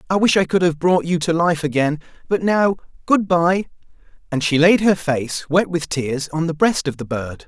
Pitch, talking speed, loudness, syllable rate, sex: 165 Hz, 225 wpm, -18 LUFS, 4.9 syllables/s, male